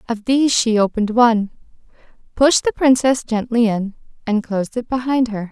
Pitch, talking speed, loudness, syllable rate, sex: 235 Hz, 165 wpm, -17 LUFS, 5.5 syllables/s, female